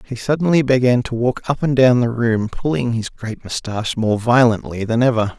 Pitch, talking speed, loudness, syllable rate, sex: 120 Hz, 200 wpm, -17 LUFS, 5.2 syllables/s, male